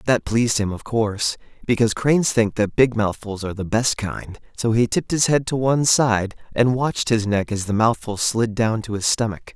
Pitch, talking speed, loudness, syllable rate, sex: 110 Hz, 220 wpm, -20 LUFS, 5.4 syllables/s, male